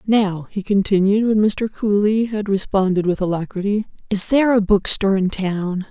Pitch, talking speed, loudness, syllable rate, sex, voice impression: 200 Hz, 165 wpm, -18 LUFS, 4.9 syllables/s, female, feminine, adult-like, soft, friendly, reassuring, slightly sweet, kind